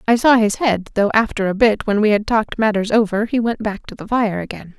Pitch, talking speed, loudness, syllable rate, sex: 215 Hz, 265 wpm, -17 LUFS, 5.7 syllables/s, female